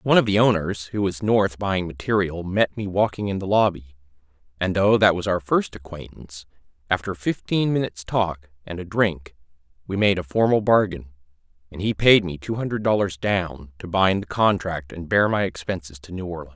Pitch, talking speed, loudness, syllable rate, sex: 95 Hz, 190 wpm, -22 LUFS, 5.3 syllables/s, male